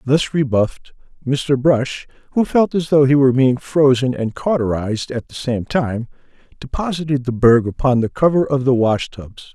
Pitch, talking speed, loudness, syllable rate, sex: 135 Hz, 175 wpm, -17 LUFS, 4.8 syllables/s, male